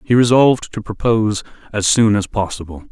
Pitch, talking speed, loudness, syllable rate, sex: 110 Hz, 165 wpm, -16 LUFS, 5.6 syllables/s, male